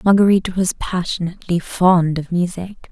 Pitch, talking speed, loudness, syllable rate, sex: 180 Hz, 125 wpm, -18 LUFS, 5.0 syllables/s, female